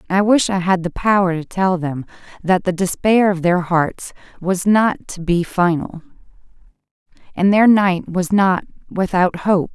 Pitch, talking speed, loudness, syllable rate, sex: 185 Hz, 170 wpm, -17 LUFS, 4.3 syllables/s, female